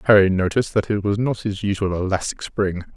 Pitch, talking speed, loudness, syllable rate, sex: 100 Hz, 205 wpm, -21 LUFS, 5.9 syllables/s, male